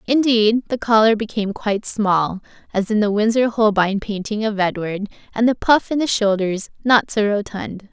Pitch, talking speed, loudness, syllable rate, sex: 215 Hz, 175 wpm, -18 LUFS, 4.9 syllables/s, female